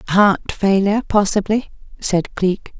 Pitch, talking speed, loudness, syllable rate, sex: 200 Hz, 105 wpm, -17 LUFS, 4.0 syllables/s, female